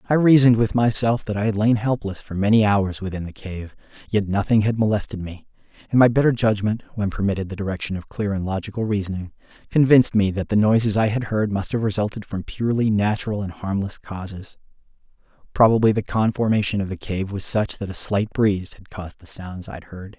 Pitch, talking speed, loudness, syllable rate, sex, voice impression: 105 Hz, 200 wpm, -21 LUFS, 6.0 syllables/s, male, masculine, adult-like, slightly weak, fluent, raspy, cool, mature, unique, wild, slightly kind, slightly modest